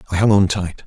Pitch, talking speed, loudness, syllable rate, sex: 95 Hz, 280 wpm, -17 LUFS, 6.5 syllables/s, male